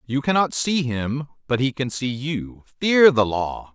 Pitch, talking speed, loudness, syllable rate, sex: 130 Hz, 190 wpm, -21 LUFS, 4.0 syllables/s, male